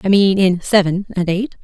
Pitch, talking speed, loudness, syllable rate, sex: 190 Hz, 220 wpm, -16 LUFS, 5.0 syllables/s, female